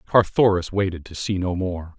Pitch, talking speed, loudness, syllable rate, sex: 95 Hz, 180 wpm, -22 LUFS, 4.9 syllables/s, male